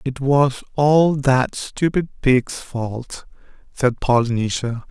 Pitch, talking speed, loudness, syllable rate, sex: 135 Hz, 110 wpm, -19 LUFS, 3.1 syllables/s, male